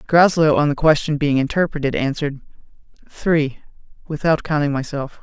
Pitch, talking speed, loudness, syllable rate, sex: 145 Hz, 125 wpm, -19 LUFS, 5.4 syllables/s, male